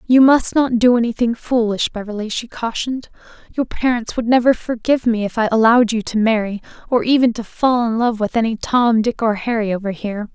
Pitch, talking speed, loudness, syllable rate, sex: 230 Hz, 205 wpm, -17 LUFS, 5.7 syllables/s, female